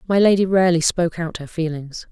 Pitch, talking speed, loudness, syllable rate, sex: 170 Hz, 200 wpm, -19 LUFS, 6.2 syllables/s, female